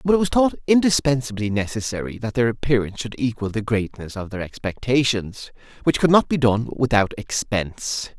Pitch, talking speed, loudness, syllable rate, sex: 120 Hz, 170 wpm, -21 LUFS, 5.5 syllables/s, male